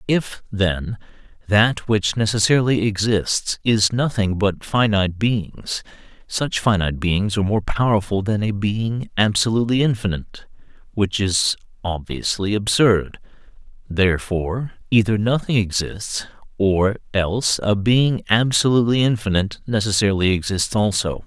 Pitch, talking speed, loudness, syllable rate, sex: 105 Hz, 110 wpm, -20 LUFS, 4.6 syllables/s, male